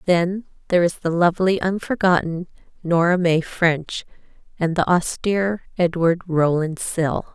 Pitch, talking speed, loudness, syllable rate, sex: 175 Hz, 125 wpm, -20 LUFS, 4.4 syllables/s, female